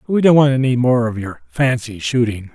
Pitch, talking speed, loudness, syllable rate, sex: 120 Hz, 210 wpm, -16 LUFS, 5.1 syllables/s, male